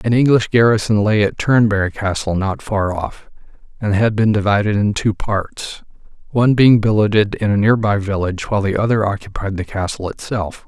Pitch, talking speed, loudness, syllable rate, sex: 105 Hz, 175 wpm, -17 LUFS, 5.3 syllables/s, male